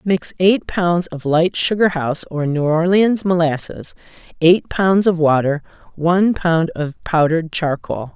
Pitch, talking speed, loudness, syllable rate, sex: 170 Hz, 145 wpm, -17 LUFS, 4.2 syllables/s, female